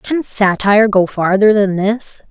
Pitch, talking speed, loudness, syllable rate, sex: 205 Hz, 155 wpm, -13 LUFS, 4.1 syllables/s, female